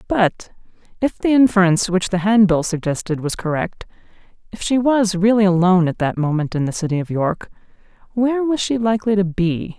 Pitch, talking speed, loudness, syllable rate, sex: 195 Hz, 165 wpm, -18 LUFS, 5.6 syllables/s, female